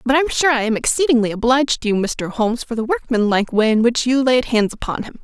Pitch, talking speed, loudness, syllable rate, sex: 240 Hz, 250 wpm, -17 LUFS, 6.3 syllables/s, female